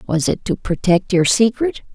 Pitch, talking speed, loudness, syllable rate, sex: 205 Hz, 185 wpm, -17 LUFS, 4.6 syllables/s, female